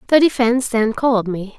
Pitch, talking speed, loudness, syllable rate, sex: 235 Hz, 190 wpm, -17 LUFS, 5.8 syllables/s, female